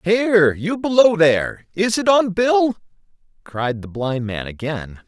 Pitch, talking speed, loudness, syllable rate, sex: 175 Hz, 155 wpm, -18 LUFS, 4.0 syllables/s, male